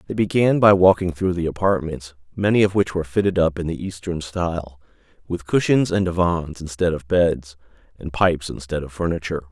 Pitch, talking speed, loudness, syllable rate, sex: 85 Hz, 185 wpm, -20 LUFS, 5.6 syllables/s, male